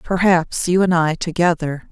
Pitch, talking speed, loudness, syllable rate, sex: 170 Hz, 155 wpm, -17 LUFS, 4.5 syllables/s, female